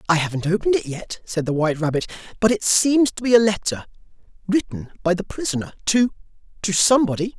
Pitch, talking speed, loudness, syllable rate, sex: 195 Hz, 180 wpm, -20 LUFS, 6.3 syllables/s, male